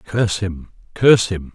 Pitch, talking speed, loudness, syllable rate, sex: 95 Hz, 155 wpm, -17 LUFS, 4.9 syllables/s, male